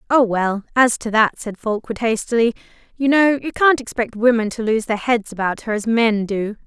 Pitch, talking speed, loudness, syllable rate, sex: 230 Hz, 205 wpm, -18 LUFS, 5.2 syllables/s, female